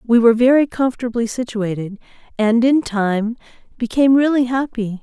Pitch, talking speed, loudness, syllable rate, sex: 235 Hz, 130 wpm, -17 LUFS, 5.3 syllables/s, female